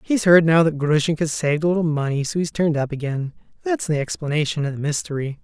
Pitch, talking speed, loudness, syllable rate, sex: 155 Hz, 210 wpm, -20 LUFS, 6.4 syllables/s, male